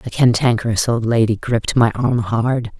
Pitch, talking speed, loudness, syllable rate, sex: 115 Hz, 170 wpm, -17 LUFS, 4.8 syllables/s, female